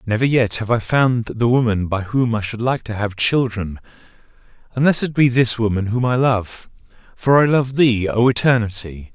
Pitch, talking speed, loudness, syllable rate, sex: 115 Hz, 190 wpm, -18 LUFS, 4.9 syllables/s, male